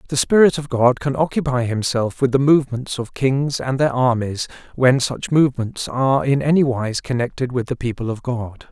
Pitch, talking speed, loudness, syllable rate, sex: 130 Hz, 185 wpm, -19 LUFS, 5.2 syllables/s, male